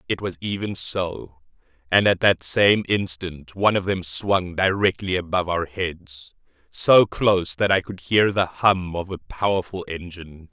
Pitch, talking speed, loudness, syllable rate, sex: 90 Hz, 165 wpm, -21 LUFS, 4.3 syllables/s, male